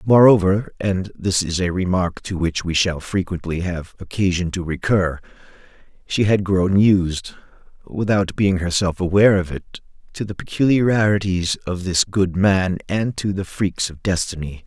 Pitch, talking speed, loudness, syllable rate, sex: 95 Hz, 145 wpm, -19 LUFS, 4.4 syllables/s, male